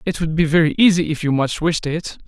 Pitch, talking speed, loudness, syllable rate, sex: 160 Hz, 265 wpm, -18 LUFS, 5.8 syllables/s, male